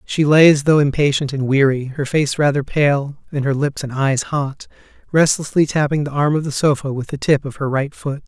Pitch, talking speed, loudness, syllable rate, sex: 140 Hz, 225 wpm, -17 LUFS, 5.1 syllables/s, male